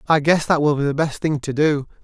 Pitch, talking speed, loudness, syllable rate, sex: 150 Hz, 295 wpm, -19 LUFS, 5.8 syllables/s, male